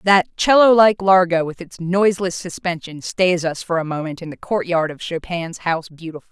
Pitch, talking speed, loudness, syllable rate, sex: 175 Hz, 190 wpm, -18 LUFS, 5.2 syllables/s, female